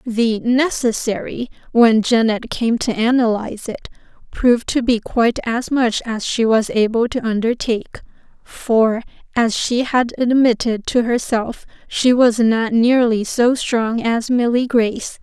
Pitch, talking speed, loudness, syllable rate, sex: 235 Hz, 140 wpm, -17 LUFS, 4.2 syllables/s, female